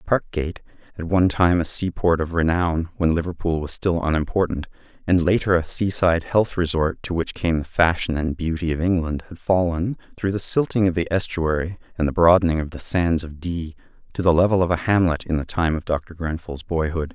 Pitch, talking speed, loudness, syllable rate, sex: 85 Hz, 200 wpm, -21 LUFS, 5.5 syllables/s, male